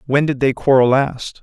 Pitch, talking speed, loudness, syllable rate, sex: 135 Hz, 210 wpm, -16 LUFS, 4.7 syllables/s, male